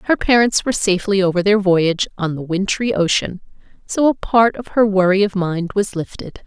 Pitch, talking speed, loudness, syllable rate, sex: 200 Hz, 195 wpm, -17 LUFS, 5.3 syllables/s, female